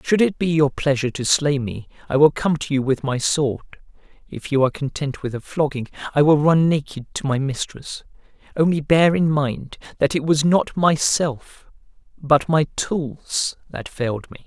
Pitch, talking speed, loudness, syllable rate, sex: 145 Hz, 185 wpm, -20 LUFS, 4.6 syllables/s, male